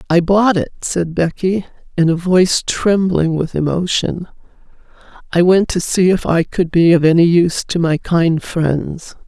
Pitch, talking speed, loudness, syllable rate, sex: 175 Hz, 170 wpm, -15 LUFS, 4.4 syllables/s, female